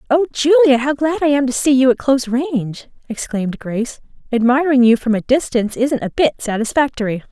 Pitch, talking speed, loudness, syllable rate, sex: 260 Hz, 190 wpm, -16 LUFS, 5.8 syllables/s, female